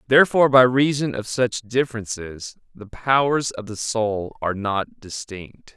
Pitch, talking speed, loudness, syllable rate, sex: 115 Hz, 145 wpm, -21 LUFS, 4.5 syllables/s, male